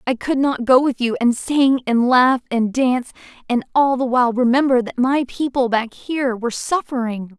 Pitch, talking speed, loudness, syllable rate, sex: 250 Hz, 195 wpm, -18 LUFS, 5.1 syllables/s, female